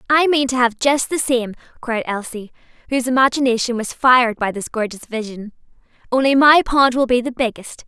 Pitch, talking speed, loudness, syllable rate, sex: 245 Hz, 185 wpm, -17 LUFS, 5.5 syllables/s, female